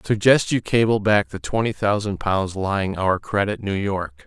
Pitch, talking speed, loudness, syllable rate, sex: 100 Hz, 185 wpm, -21 LUFS, 4.6 syllables/s, male